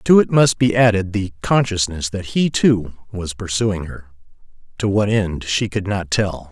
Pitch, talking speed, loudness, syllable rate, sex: 100 Hz, 185 wpm, -18 LUFS, 4.4 syllables/s, male